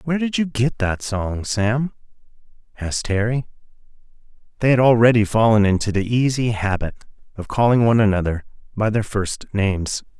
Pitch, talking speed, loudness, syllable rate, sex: 110 Hz, 140 wpm, -19 LUFS, 5.4 syllables/s, male